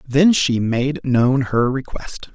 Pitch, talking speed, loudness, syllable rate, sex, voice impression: 135 Hz, 155 wpm, -18 LUFS, 3.2 syllables/s, male, very masculine, very adult-like, middle-aged, thick, slightly relaxed, slightly weak, slightly dark, very soft, clear, fluent, slightly raspy, cool, very intellectual, refreshing, very sincere, very calm, slightly mature, very friendly, very reassuring, unique, very elegant, very sweet, lively, kind, modest